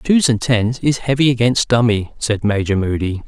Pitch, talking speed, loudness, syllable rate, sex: 115 Hz, 185 wpm, -16 LUFS, 4.7 syllables/s, male